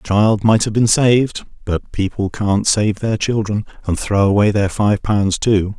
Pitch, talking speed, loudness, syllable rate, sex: 105 Hz, 195 wpm, -16 LUFS, 4.3 syllables/s, male